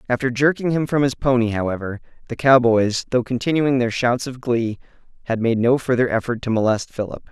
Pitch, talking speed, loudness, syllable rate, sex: 120 Hz, 190 wpm, -20 LUFS, 5.6 syllables/s, male